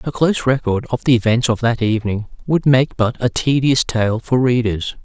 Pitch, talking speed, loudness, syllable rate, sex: 120 Hz, 200 wpm, -17 LUFS, 5.2 syllables/s, male